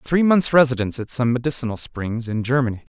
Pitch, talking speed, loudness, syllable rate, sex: 125 Hz, 205 wpm, -20 LUFS, 6.5 syllables/s, male